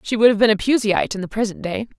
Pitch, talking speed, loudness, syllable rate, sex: 215 Hz, 300 wpm, -19 LUFS, 7.2 syllables/s, female